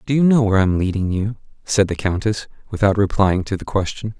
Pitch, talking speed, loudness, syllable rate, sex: 100 Hz, 230 wpm, -19 LUFS, 6.1 syllables/s, male